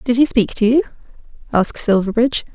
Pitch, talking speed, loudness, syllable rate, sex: 230 Hz, 165 wpm, -16 LUFS, 6.6 syllables/s, female